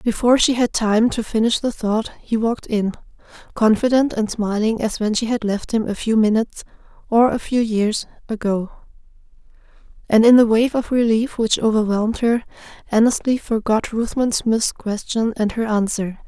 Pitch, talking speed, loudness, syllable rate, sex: 225 Hz, 160 wpm, -19 LUFS, 5.0 syllables/s, female